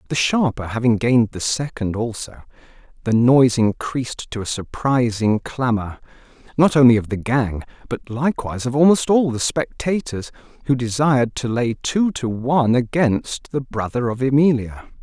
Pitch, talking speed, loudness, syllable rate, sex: 125 Hz, 150 wpm, -19 LUFS, 4.9 syllables/s, male